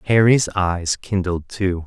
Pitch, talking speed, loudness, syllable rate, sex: 95 Hz, 130 wpm, -19 LUFS, 3.7 syllables/s, male